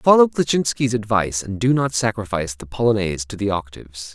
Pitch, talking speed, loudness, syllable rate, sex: 110 Hz, 175 wpm, -20 LUFS, 6.1 syllables/s, male